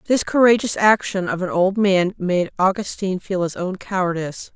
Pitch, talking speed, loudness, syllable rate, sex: 190 Hz, 170 wpm, -19 LUFS, 5.1 syllables/s, female